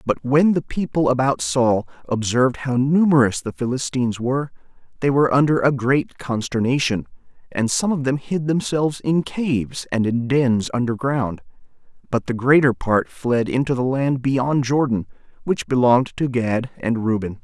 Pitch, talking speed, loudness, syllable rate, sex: 130 Hz, 160 wpm, -20 LUFS, 4.8 syllables/s, male